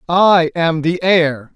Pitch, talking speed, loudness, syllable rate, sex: 165 Hz, 155 wpm, -14 LUFS, 3.0 syllables/s, male